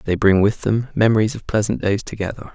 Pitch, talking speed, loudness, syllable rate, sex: 105 Hz, 210 wpm, -19 LUFS, 5.7 syllables/s, male